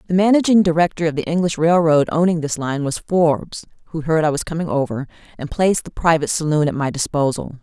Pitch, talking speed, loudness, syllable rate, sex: 160 Hz, 205 wpm, -18 LUFS, 6.1 syllables/s, female